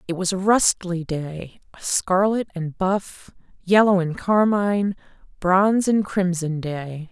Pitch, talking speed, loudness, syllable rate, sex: 185 Hz, 135 wpm, -21 LUFS, 3.8 syllables/s, female